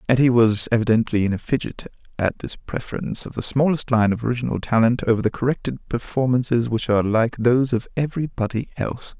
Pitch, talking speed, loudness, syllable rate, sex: 120 Hz, 185 wpm, -21 LUFS, 6.2 syllables/s, male